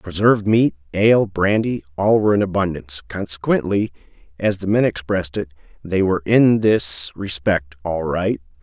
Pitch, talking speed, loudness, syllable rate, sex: 95 Hz, 140 wpm, -19 LUFS, 5.1 syllables/s, male